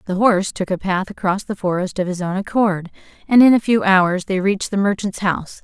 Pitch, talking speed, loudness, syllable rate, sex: 195 Hz, 235 wpm, -18 LUFS, 5.7 syllables/s, female